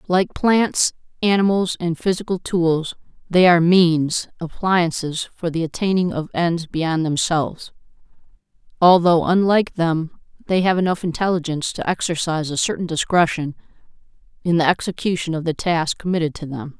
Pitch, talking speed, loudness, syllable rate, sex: 170 Hz, 135 wpm, -19 LUFS, 5.0 syllables/s, female